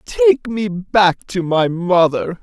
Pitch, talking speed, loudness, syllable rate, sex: 180 Hz, 150 wpm, -16 LUFS, 3.8 syllables/s, male